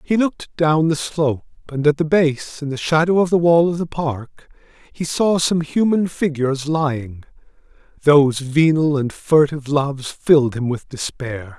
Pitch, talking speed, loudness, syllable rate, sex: 150 Hz, 170 wpm, -18 LUFS, 4.8 syllables/s, male